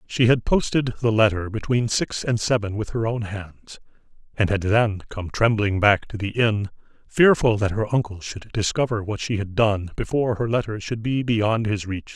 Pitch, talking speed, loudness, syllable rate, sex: 110 Hz, 195 wpm, -22 LUFS, 4.7 syllables/s, male